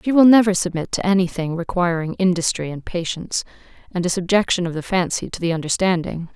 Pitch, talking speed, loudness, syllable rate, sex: 180 Hz, 190 wpm, -20 LUFS, 6.0 syllables/s, female